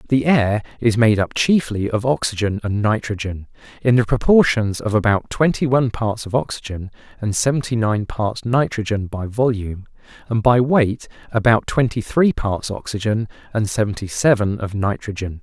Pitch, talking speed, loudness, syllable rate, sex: 110 Hz, 155 wpm, -19 LUFS, 5.0 syllables/s, male